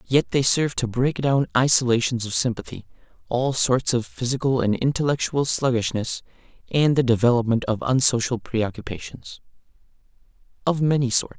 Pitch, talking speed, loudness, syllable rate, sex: 125 Hz, 130 wpm, -22 LUFS, 5.2 syllables/s, male